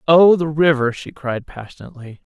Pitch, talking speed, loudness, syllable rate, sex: 145 Hz, 155 wpm, -17 LUFS, 5.3 syllables/s, male